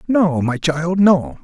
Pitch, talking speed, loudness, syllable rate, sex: 160 Hz, 170 wpm, -16 LUFS, 3.2 syllables/s, male